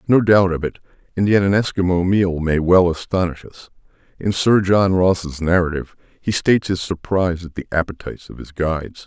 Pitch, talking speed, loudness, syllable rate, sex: 90 Hz, 185 wpm, -18 LUFS, 5.4 syllables/s, male